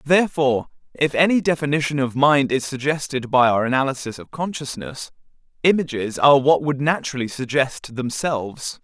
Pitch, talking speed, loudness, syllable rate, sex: 140 Hz, 135 wpm, -20 LUFS, 5.4 syllables/s, male